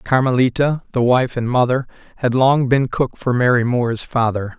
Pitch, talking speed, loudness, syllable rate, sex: 125 Hz, 170 wpm, -17 LUFS, 4.9 syllables/s, male